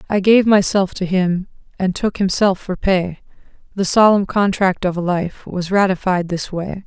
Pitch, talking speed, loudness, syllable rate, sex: 190 Hz, 175 wpm, -17 LUFS, 4.4 syllables/s, female